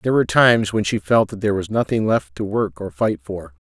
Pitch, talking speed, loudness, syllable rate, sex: 110 Hz, 260 wpm, -19 LUFS, 6.1 syllables/s, male